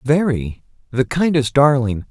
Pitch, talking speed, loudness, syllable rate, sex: 135 Hz, 85 wpm, -17 LUFS, 4.2 syllables/s, male